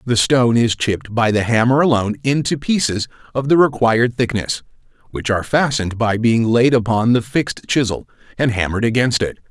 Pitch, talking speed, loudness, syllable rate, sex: 120 Hz, 175 wpm, -17 LUFS, 5.7 syllables/s, male